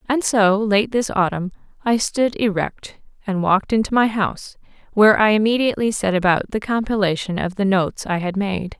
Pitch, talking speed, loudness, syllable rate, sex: 205 Hz, 175 wpm, -19 LUFS, 5.4 syllables/s, female